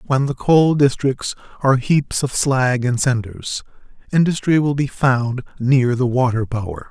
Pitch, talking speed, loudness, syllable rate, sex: 130 Hz, 155 wpm, -18 LUFS, 4.3 syllables/s, male